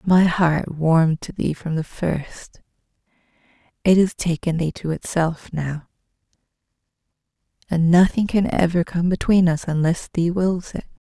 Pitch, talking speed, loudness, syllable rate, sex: 170 Hz, 140 wpm, -20 LUFS, 4.3 syllables/s, female